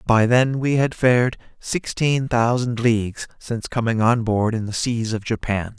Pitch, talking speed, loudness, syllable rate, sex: 115 Hz, 175 wpm, -20 LUFS, 4.5 syllables/s, male